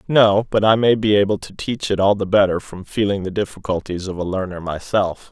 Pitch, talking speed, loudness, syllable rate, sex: 100 Hz, 225 wpm, -19 LUFS, 5.5 syllables/s, male